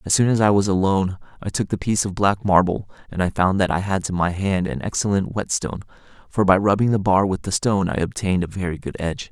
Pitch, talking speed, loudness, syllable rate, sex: 95 Hz, 250 wpm, -21 LUFS, 6.4 syllables/s, male